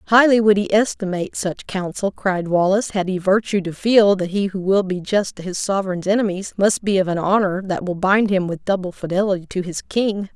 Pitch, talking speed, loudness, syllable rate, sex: 195 Hz, 220 wpm, -19 LUFS, 5.6 syllables/s, female